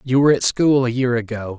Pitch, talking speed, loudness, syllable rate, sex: 125 Hz, 265 wpm, -18 LUFS, 6.0 syllables/s, male